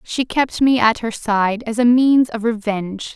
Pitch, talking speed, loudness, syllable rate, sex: 225 Hz, 210 wpm, -17 LUFS, 4.3 syllables/s, female